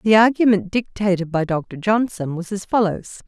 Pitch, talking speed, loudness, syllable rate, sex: 200 Hz, 165 wpm, -19 LUFS, 4.8 syllables/s, female